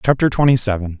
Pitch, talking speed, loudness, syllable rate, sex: 115 Hz, 180 wpm, -16 LUFS, 6.7 syllables/s, male